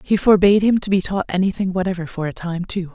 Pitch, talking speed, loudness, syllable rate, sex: 185 Hz, 245 wpm, -19 LUFS, 6.4 syllables/s, female